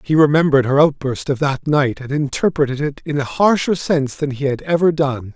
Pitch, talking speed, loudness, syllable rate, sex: 145 Hz, 215 wpm, -17 LUFS, 5.6 syllables/s, male